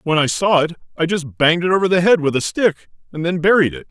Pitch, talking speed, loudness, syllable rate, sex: 165 Hz, 275 wpm, -17 LUFS, 6.6 syllables/s, male